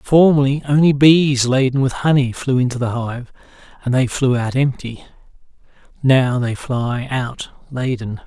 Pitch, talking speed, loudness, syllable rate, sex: 130 Hz, 145 wpm, -17 LUFS, 4.4 syllables/s, male